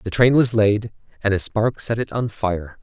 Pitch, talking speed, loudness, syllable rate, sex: 110 Hz, 235 wpm, -20 LUFS, 4.4 syllables/s, male